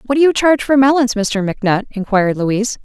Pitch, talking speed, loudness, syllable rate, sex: 230 Hz, 210 wpm, -15 LUFS, 6.9 syllables/s, female